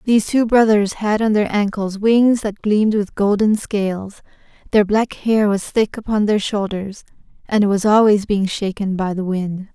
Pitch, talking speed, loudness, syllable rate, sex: 205 Hz, 185 wpm, -17 LUFS, 4.7 syllables/s, female